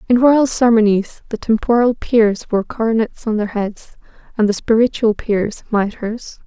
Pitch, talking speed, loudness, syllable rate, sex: 220 Hz, 150 wpm, -16 LUFS, 4.5 syllables/s, female